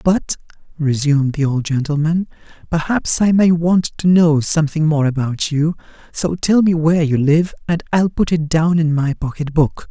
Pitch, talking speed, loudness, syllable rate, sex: 160 Hz, 180 wpm, -16 LUFS, 4.8 syllables/s, male